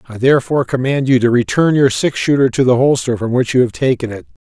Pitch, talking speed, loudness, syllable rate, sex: 130 Hz, 240 wpm, -14 LUFS, 6.3 syllables/s, male